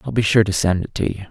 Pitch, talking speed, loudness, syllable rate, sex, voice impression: 100 Hz, 365 wpm, -19 LUFS, 6.7 syllables/s, male, very masculine, very adult-like, slightly middle-aged, very relaxed, very weak, very dark, slightly soft, muffled, slightly halting, very raspy, cool, slightly intellectual, sincere, very calm, very mature, slightly friendly, reassuring, very unique, slightly elegant, wild, kind, modest